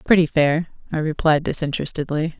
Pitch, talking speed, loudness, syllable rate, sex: 155 Hz, 125 wpm, -21 LUFS, 5.9 syllables/s, female